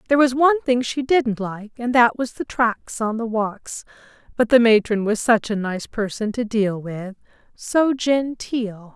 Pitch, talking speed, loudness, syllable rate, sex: 230 Hz, 190 wpm, -20 LUFS, 4.2 syllables/s, female